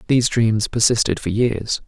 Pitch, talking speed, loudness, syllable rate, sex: 110 Hz, 160 wpm, -18 LUFS, 4.9 syllables/s, male